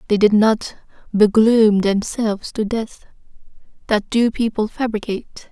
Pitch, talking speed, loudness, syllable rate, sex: 215 Hz, 110 wpm, -18 LUFS, 4.4 syllables/s, female